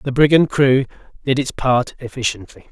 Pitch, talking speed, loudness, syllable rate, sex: 130 Hz, 155 wpm, -17 LUFS, 4.9 syllables/s, male